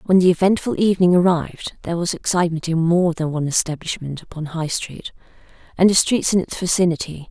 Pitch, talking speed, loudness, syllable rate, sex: 170 Hz, 180 wpm, -19 LUFS, 6.1 syllables/s, female